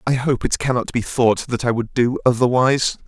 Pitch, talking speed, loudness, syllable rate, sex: 125 Hz, 215 wpm, -19 LUFS, 5.3 syllables/s, male